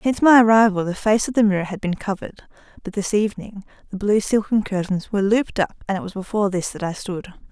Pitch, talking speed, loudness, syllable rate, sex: 205 Hz, 230 wpm, -20 LUFS, 6.8 syllables/s, female